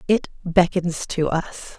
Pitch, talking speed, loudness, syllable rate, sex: 175 Hz, 135 wpm, -22 LUFS, 4.2 syllables/s, female